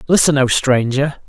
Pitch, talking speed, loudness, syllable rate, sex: 140 Hz, 140 wpm, -15 LUFS, 4.7 syllables/s, male